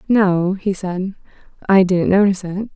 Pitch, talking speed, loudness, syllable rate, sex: 190 Hz, 150 wpm, -17 LUFS, 4.4 syllables/s, female